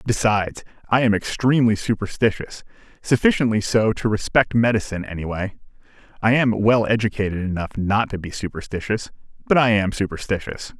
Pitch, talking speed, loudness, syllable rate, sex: 105 Hz, 135 wpm, -21 LUFS, 3.3 syllables/s, male